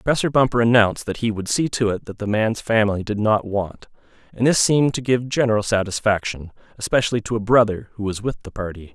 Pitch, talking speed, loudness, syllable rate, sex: 110 Hz, 215 wpm, -20 LUFS, 6.3 syllables/s, male